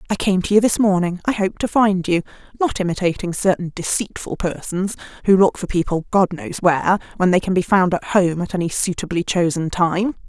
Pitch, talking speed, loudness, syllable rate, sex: 185 Hz, 205 wpm, -19 LUFS, 5.6 syllables/s, female